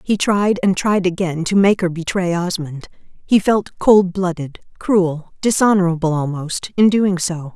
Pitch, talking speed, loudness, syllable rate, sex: 180 Hz, 160 wpm, -17 LUFS, 4.2 syllables/s, female